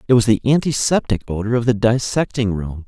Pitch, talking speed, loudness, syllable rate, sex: 115 Hz, 190 wpm, -18 LUFS, 5.8 syllables/s, male